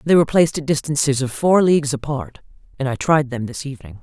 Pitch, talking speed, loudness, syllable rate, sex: 140 Hz, 225 wpm, -19 LUFS, 6.4 syllables/s, female